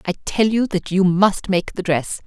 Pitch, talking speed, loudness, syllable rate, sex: 190 Hz, 240 wpm, -19 LUFS, 4.3 syllables/s, female